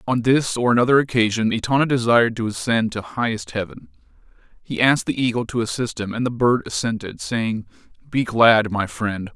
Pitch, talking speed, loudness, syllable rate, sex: 115 Hz, 180 wpm, -20 LUFS, 5.5 syllables/s, male